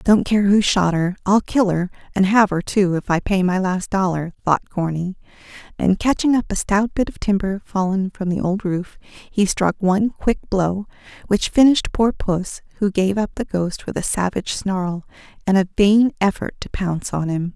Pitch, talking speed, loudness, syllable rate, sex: 195 Hz, 200 wpm, -19 LUFS, 4.7 syllables/s, female